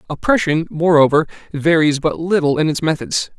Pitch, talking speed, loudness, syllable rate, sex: 160 Hz, 140 wpm, -16 LUFS, 5.3 syllables/s, male